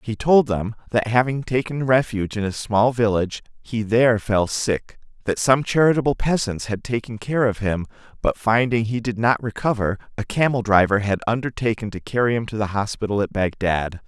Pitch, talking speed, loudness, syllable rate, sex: 115 Hz, 185 wpm, -21 LUFS, 5.3 syllables/s, male